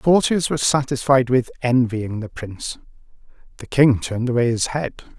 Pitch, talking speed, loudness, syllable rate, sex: 125 Hz, 150 wpm, -20 LUFS, 5.3 syllables/s, male